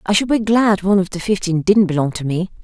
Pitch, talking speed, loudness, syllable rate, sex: 190 Hz, 275 wpm, -17 LUFS, 6.2 syllables/s, female